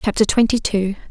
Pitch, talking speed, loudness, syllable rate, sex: 210 Hz, 165 wpm, -18 LUFS, 5.6 syllables/s, female